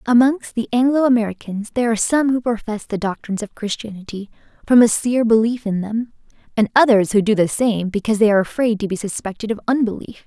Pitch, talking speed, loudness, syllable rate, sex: 220 Hz, 200 wpm, -18 LUFS, 6.5 syllables/s, female